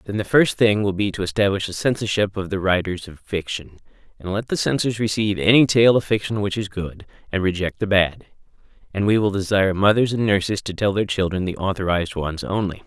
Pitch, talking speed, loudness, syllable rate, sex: 100 Hz, 215 wpm, -20 LUFS, 5.9 syllables/s, male